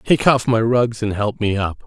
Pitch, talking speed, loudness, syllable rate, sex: 115 Hz, 255 wpm, -18 LUFS, 4.6 syllables/s, male